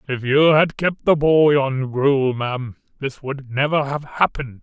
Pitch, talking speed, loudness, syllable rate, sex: 140 Hz, 180 wpm, -19 LUFS, 4.3 syllables/s, male